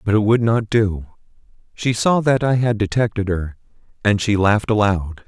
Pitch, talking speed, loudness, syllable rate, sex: 105 Hz, 180 wpm, -18 LUFS, 4.8 syllables/s, male